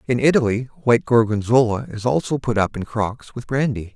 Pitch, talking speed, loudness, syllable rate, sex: 120 Hz, 180 wpm, -20 LUFS, 5.5 syllables/s, male